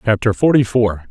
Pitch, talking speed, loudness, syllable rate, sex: 110 Hz, 165 wpm, -15 LUFS, 5.2 syllables/s, male